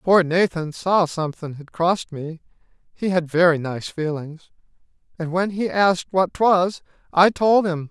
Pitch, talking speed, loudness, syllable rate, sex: 175 Hz, 145 wpm, -20 LUFS, 4.6 syllables/s, male